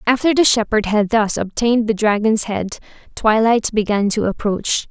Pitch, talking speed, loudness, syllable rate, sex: 220 Hz, 160 wpm, -17 LUFS, 5.0 syllables/s, female